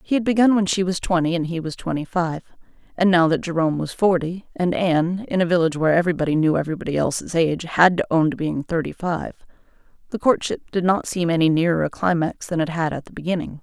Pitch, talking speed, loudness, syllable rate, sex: 170 Hz, 225 wpm, -21 LUFS, 6.4 syllables/s, female